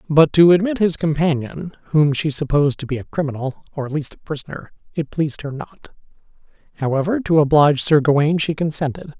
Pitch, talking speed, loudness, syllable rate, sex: 150 Hz, 185 wpm, -18 LUFS, 5.9 syllables/s, male